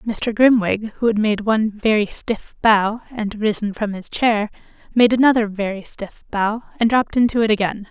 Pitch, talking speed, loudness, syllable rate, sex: 215 Hz, 180 wpm, -19 LUFS, 4.9 syllables/s, female